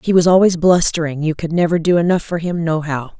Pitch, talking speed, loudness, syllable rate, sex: 165 Hz, 245 wpm, -16 LUFS, 5.9 syllables/s, female